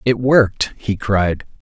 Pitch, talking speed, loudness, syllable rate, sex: 110 Hz, 150 wpm, -17 LUFS, 3.7 syllables/s, male